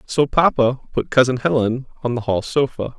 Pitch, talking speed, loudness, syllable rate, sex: 130 Hz, 180 wpm, -19 LUFS, 5.0 syllables/s, male